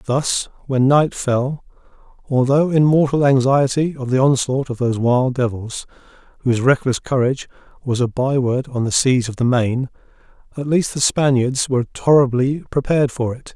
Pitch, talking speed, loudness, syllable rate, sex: 130 Hz, 160 wpm, -18 LUFS, 5.0 syllables/s, male